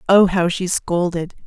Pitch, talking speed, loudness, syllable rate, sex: 180 Hz, 165 wpm, -18 LUFS, 4.2 syllables/s, female